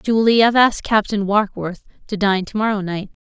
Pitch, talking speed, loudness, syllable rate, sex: 205 Hz, 205 wpm, -17 LUFS, 6.2 syllables/s, female